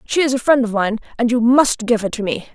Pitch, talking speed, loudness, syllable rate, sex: 235 Hz, 305 wpm, -17 LUFS, 5.9 syllables/s, female